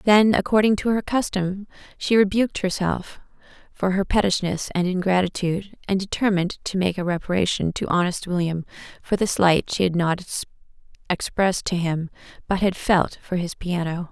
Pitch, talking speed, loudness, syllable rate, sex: 185 Hz, 155 wpm, -22 LUFS, 5.2 syllables/s, female